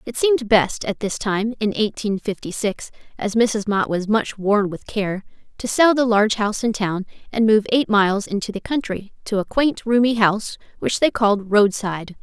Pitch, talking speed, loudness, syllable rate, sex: 215 Hz, 200 wpm, -20 LUFS, 5.0 syllables/s, female